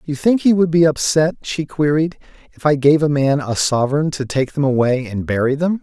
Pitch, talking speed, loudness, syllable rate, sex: 150 Hz, 225 wpm, -17 LUFS, 5.3 syllables/s, male